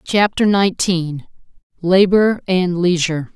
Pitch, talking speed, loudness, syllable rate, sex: 180 Hz, 90 wpm, -16 LUFS, 4.1 syllables/s, female